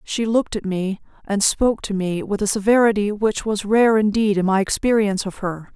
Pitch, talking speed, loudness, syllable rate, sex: 205 Hz, 210 wpm, -19 LUFS, 5.4 syllables/s, female